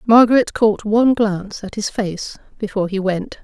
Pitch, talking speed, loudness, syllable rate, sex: 210 Hz, 175 wpm, -17 LUFS, 5.2 syllables/s, female